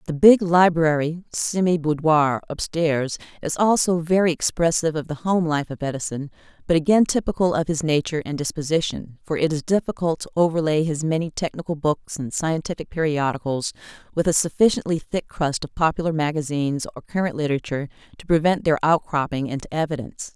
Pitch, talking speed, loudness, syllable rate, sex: 160 Hz, 155 wpm, -22 LUFS, 5.8 syllables/s, female